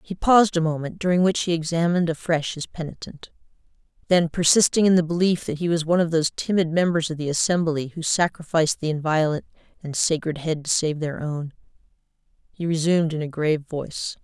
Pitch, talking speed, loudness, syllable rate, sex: 165 Hz, 185 wpm, -22 LUFS, 6.1 syllables/s, female